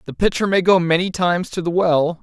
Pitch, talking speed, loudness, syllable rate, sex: 175 Hz, 245 wpm, -18 LUFS, 5.7 syllables/s, male